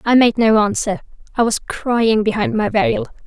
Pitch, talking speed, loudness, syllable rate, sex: 205 Hz, 165 wpm, -17 LUFS, 4.6 syllables/s, female